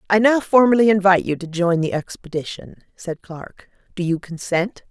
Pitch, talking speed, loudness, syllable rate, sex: 185 Hz, 170 wpm, -18 LUFS, 5.1 syllables/s, female